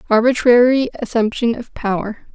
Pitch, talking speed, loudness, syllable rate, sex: 230 Hz, 100 wpm, -16 LUFS, 4.9 syllables/s, female